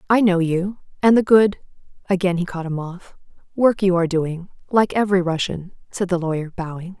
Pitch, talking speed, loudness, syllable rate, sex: 185 Hz, 170 wpm, -20 LUFS, 5.6 syllables/s, female